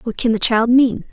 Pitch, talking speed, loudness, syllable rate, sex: 235 Hz, 270 wpm, -15 LUFS, 4.8 syllables/s, female